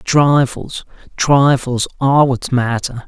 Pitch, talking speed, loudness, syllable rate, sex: 135 Hz, 100 wpm, -15 LUFS, 3.5 syllables/s, male